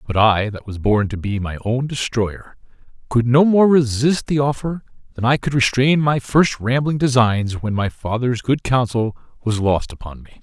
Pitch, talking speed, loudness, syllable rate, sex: 120 Hz, 190 wpm, -18 LUFS, 4.6 syllables/s, male